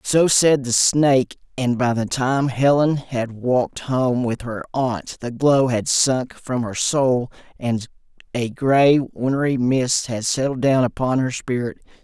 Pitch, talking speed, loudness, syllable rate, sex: 125 Hz, 165 wpm, -20 LUFS, 3.8 syllables/s, male